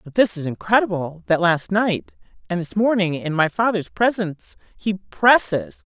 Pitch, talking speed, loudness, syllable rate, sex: 190 Hz, 160 wpm, -20 LUFS, 4.7 syllables/s, female